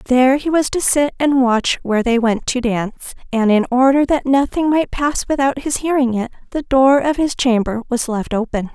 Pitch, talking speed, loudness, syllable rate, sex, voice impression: 260 Hz, 215 wpm, -16 LUFS, 4.9 syllables/s, female, very feminine, slightly adult-like, very thin, slightly tensed, slightly weak, slightly dark, soft, clear, fluent, cute, intellectual, refreshing, sincere, very calm, very friendly, very reassuring, unique, very elegant, slightly wild, sweet, lively, kind, slightly sharp, slightly modest, light